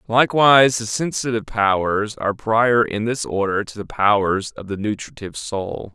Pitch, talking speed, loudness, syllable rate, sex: 110 Hz, 160 wpm, -19 LUFS, 5.0 syllables/s, male